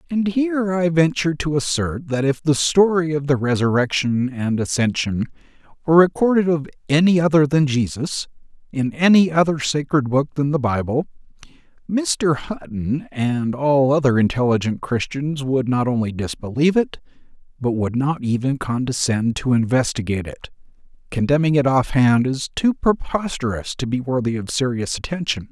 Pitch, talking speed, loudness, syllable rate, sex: 140 Hz, 145 wpm, -19 LUFS, 4.9 syllables/s, male